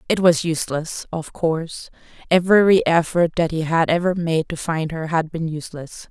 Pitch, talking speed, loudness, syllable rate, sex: 165 Hz, 155 wpm, -20 LUFS, 5.0 syllables/s, female